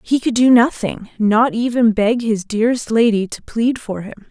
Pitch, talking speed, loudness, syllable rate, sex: 225 Hz, 180 wpm, -16 LUFS, 4.8 syllables/s, female